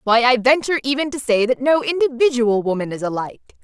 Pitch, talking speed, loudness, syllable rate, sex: 250 Hz, 200 wpm, -18 LUFS, 6.4 syllables/s, female